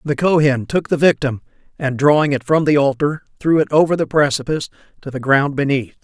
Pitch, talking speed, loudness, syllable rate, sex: 145 Hz, 200 wpm, -17 LUFS, 5.8 syllables/s, male